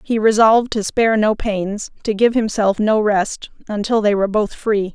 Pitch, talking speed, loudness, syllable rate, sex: 210 Hz, 195 wpm, -17 LUFS, 4.8 syllables/s, female